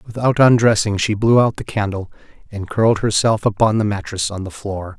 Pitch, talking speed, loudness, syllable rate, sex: 105 Hz, 195 wpm, -17 LUFS, 5.4 syllables/s, male